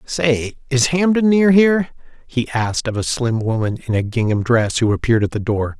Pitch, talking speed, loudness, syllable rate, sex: 130 Hz, 205 wpm, -17 LUFS, 5.3 syllables/s, male